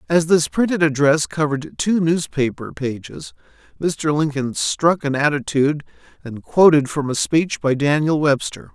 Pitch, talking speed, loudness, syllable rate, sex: 150 Hz, 145 wpm, -19 LUFS, 4.6 syllables/s, male